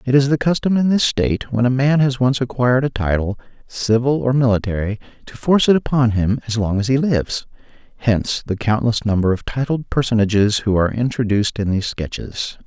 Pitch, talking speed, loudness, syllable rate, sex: 120 Hz, 195 wpm, -18 LUFS, 5.8 syllables/s, male